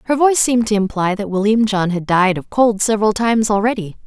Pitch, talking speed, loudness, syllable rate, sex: 210 Hz, 220 wpm, -16 LUFS, 6.3 syllables/s, female